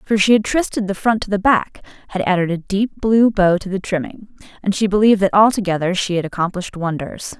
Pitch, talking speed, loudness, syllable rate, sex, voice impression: 195 Hz, 220 wpm, -17 LUFS, 5.9 syllables/s, female, feminine, adult-like, slightly intellectual, slightly elegant